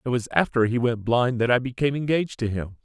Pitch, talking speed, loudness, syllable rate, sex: 125 Hz, 255 wpm, -23 LUFS, 6.3 syllables/s, male